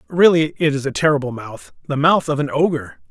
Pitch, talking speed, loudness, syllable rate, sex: 140 Hz, 210 wpm, -18 LUFS, 5.6 syllables/s, male